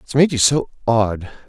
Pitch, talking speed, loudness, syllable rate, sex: 120 Hz, 205 wpm, -17 LUFS, 4.5 syllables/s, male